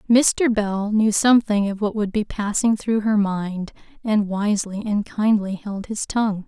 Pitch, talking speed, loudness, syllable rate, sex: 210 Hz, 175 wpm, -21 LUFS, 4.4 syllables/s, female